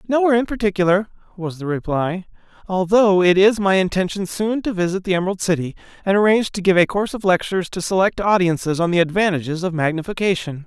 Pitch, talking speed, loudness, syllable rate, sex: 190 Hz, 185 wpm, -19 LUFS, 6.4 syllables/s, male